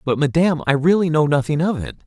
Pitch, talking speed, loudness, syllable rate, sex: 155 Hz, 235 wpm, -18 LUFS, 6.4 syllables/s, male